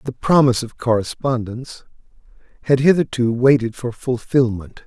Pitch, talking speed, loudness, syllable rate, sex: 125 Hz, 110 wpm, -18 LUFS, 5.1 syllables/s, male